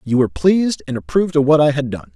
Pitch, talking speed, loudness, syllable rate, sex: 155 Hz, 280 wpm, -16 LUFS, 7.0 syllables/s, male